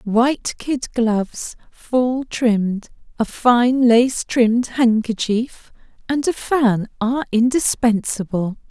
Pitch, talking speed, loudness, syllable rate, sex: 235 Hz, 105 wpm, -18 LUFS, 3.5 syllables/s, female